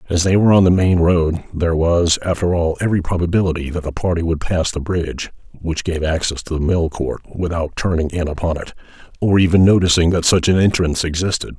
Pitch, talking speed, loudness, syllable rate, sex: 85 Hz, 205 wpm, -17 LUFS, 6.0 syllables/s, male